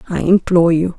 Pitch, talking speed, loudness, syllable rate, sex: 175 Hz, 185 wpm, -14 LUFS, 6.2 syllables/s, female